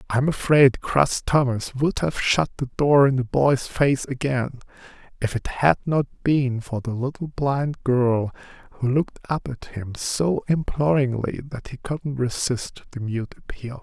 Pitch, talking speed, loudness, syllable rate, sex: 135 Hz, 165 wpm, -22 LUFS, 4.0 syllables/s, male